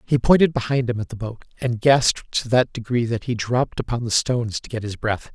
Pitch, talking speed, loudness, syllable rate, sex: 120 Hz, 245 wpm, -21 LUFS, 5.8 syllables/s, male